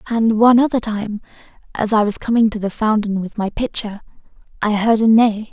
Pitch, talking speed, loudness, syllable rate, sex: 220 Hz, 195 wpm, -17 LUFS, 5.4 syllables/s, female